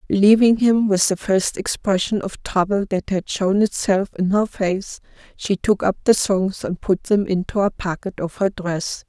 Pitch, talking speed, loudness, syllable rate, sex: 195 Hz, 190 wpm, -20 LUFS, 4.4 syllables/s, female